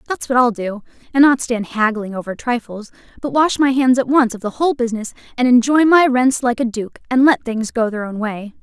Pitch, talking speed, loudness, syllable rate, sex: 240 Hz, 235 wpm, -17 LUFS, 5.5 syllables/s, female